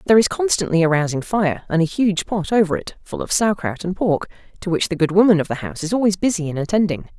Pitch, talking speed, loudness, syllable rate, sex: 185 Hz, 260 wpm, -19 LUFS, 6.4 syllables/s, female